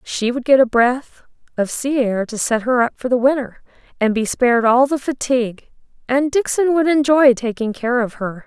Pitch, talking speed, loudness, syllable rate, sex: 250 Hz, 205 wpm, -17 LUFS, 4.9 syllables/s, female